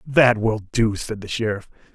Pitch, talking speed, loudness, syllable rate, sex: 110 Hz, 185 wpm, -21 LUFS, 4.3 syllables/s, male